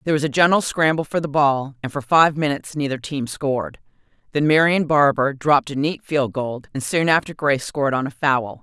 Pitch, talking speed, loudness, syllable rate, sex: 145 Hz, 215 wpm, -20 LUFS, 5.8 syllables/s, female